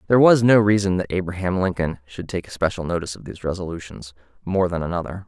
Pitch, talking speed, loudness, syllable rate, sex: 90 Hz, 195 wpm, -21 LUFS, 6.8 syllables/s, male